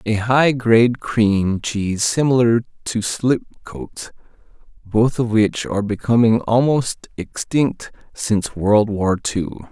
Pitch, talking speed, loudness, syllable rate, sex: 110 Hz, 115 wpm, -18 LUFS, 3.9 syllables/s, male